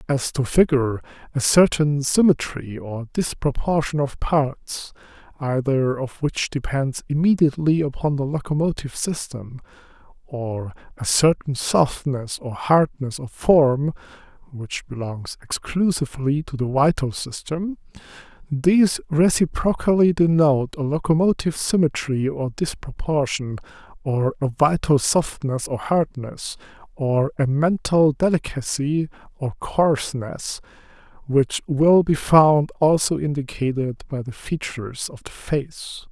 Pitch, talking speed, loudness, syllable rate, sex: 145 Hz, 105 wpm, -21 LUFS, 3.2 syllables/s, male